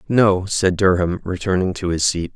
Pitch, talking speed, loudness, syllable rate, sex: 90 Hz, 180 wpm, -18 LUFS, 4.7 syllables/s, male